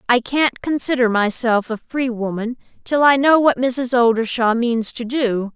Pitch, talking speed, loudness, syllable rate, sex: 245 Hz, 175 wpm, -18 LUFS, 4.3 syllables/s, female